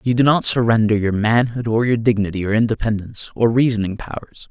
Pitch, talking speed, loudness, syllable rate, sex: 115 Hz, 185 wpm, -18 LUFS, 6.0 syllables/s, male